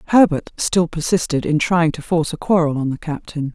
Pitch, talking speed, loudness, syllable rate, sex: 160 Hz, 205 wpm, -19 LUFS, 5.5 syllables/s, female